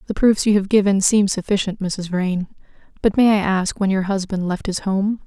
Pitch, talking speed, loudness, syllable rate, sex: 195 Hz, 215 wpm, -19 LUFS, 5.1 syllables/s, female